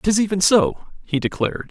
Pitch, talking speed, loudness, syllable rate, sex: 190 Hz, 175 wpm, -19 LUFS, 5.1 syllables/s, male